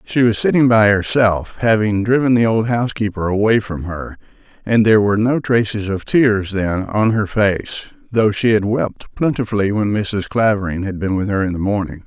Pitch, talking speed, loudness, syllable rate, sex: 105 Hz, 200 wpm, -17 LUFS, 5.0 syllables/s, male